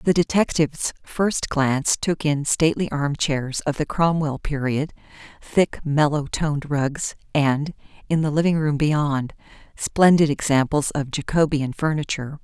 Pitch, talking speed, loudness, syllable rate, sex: 150 Hz, 130 wpm, -22 LUFS, 4.3 syllables/s, female